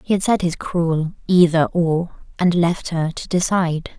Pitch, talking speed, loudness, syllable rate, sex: 170 Hz, 165 wpm, -19 LUFS, 4.3 syllables/s, female